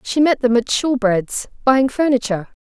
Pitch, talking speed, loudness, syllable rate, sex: 245 Hz, 135 wpm, -17 LUFS, 4.8 syllables/s, female